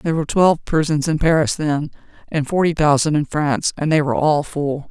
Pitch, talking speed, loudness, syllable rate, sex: 150 Hz, 210 wpm, -18 LUFS, 5.9 syllables/s, female